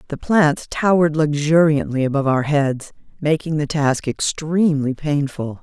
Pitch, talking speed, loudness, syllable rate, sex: 150 Hz, 130 wpm, -18 LUFS, 4.7 syllables/s, female